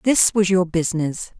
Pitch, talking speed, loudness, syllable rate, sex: 185 Hz, 170 wpm, -19 LUFS, 4.9 syllables/s, female